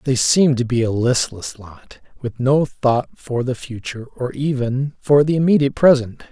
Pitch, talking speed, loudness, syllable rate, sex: 130 Hz, 180 wpm, -18 LUFS, 4.8 syllables/s, male